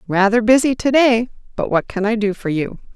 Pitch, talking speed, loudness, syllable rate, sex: 220 Hz, 225 wpm, -17 LUFS, 5.4 syllables/s, female